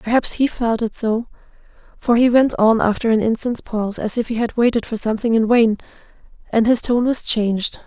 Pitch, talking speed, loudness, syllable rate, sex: 230 Hz, 205 wpm, -18 LUFS, 5.5 syllables/s, female